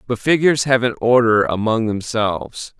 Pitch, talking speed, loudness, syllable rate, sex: 115 Hz, 150 wpm, -17 LUFS, 5.0 syllables/s, male